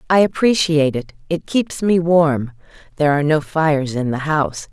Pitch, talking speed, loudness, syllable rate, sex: 155 Hz, 165 wpm, -17 LUFS, 5.4 syllables/s, female